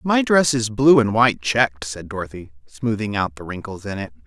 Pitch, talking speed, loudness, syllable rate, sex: 110 Hz, 210 wpm, -20 LUFS, 5.3 syllables/s, male